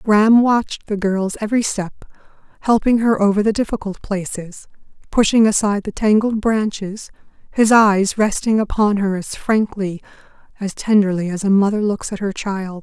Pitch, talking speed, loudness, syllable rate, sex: 205 Hz, 155 wpm, -17 LUFS, 4.9 syllables/s, female